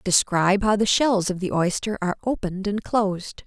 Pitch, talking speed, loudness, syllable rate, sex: 200 Hz, 190 wpm, -22 LUFS, 5.5 syllables/s, female